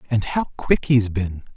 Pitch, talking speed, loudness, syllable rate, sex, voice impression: 110 Hz, 190 wpm, -21 LUFS, 4.0 syllables/s, male, very masculine, very adult-like, very old, thick, slightly relaxed, weak, slightly bright, slightly soft, very muffled, slightly fluent, very raspy, cool, intellectual, sincere, calm, very mature, friendly, slightly reassuring, very unique, slightly elegant, wild, lively, strict, intense, slightly sharp